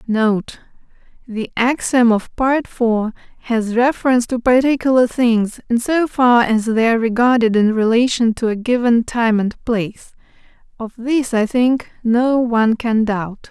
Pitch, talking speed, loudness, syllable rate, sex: 235 Hz, 145 wpm, -16 LUFS, 4.3 syllables/s, female